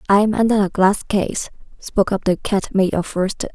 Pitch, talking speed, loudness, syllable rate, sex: 200 Hz, 220 wpm, -19 LUFS, 5.3 syllables/s, female